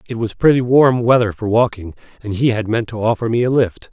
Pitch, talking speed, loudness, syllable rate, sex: 115 Hz, 245 wpm, -16 LUFS, 5.7 syllables/s, male